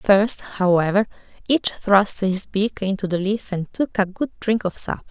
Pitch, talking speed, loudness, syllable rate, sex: 200 Hz, 190 wpm, -21 LUFS, 4.2 syllables/s, female